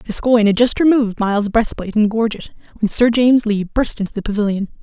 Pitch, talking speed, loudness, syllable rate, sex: 220 Hz, 200 wpm, -16 LUFS, 6.3 syllables/s, female